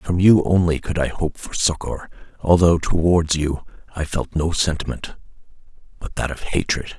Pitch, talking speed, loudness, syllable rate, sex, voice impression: 80 Hz, 165 wpm, -20 LUFS, 4.7 syllables/s, male, very masculine, very old, very thick, relaxed, slightly weak, dark, very soft, very muffled, slightly halting, very raspy, cool, very intellectual, sincere, very calm, very mature, very friendly, very reassuring, very unique, slightly elegant, very wild, lively, strict, slightly intense, modest